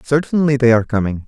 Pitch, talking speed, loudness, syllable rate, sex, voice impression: 125 Hz, 190 wpm, -15 LUFS, 7.0 syllables/s, male, very masculine, very middle-aged, very thick, very relaxed, very weak, very dark, very soft, very muffled, fluent, slightly raspy, very cool, very intellectual, very sincere, very calm, very mature, friendly, reassuring, very unique, elegant, slightly wild, very sweet, slightly lively, very kind, very modest